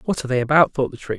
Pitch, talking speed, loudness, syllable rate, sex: 140 Hz, 355 wpm, -19 LUFS, 8.6 syllables/s, male